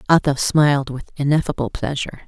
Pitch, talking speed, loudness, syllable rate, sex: 145 Hz, 130 wpm, -19 LUFS, 6.1 syllables/s, female